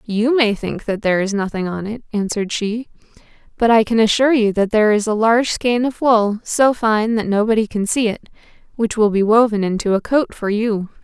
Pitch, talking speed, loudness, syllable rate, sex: 220 Hz, 215 wpm, -17 LUFS, 5.5 syllables/s, female